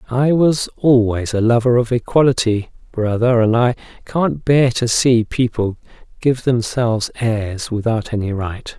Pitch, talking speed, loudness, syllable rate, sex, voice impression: 120 Hz, 145 wpm, -17 LUFS, 4.3 syllables/s, male, very masculine, very adult-like, old, very thick, tensed, powerful, bright, slightly soft, slightly clear, slightly fluent, slightly raspy, very cool, very intellectual, very sincere, very calm, friendly, very reassuring, slightly elegant, wild, slightly sweet, lively, kind